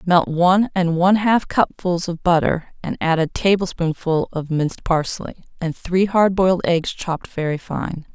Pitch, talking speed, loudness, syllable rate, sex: 175 Hz, 170 wpm, -19 LUFS, 4.6 syllables/s, female